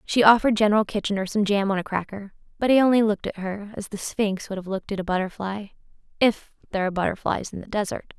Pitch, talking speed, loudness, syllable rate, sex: 205 Hz, 220 wpm, -23 LUFS, 6.7 syllables/s, female